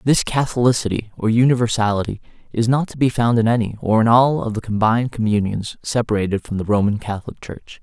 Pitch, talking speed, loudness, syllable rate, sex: 115 Hz, 185 wpm, -19 LUFS, 6.0 syllables/s, male